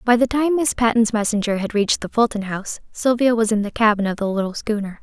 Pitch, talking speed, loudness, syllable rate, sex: 220 Hz, 240 wpm, -19 LUFS, 6.2 syllables/s, female